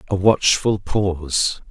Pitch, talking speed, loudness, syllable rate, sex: 95 Hz, 105 wpm, -19 LUFS, 3.4 syllables/s, male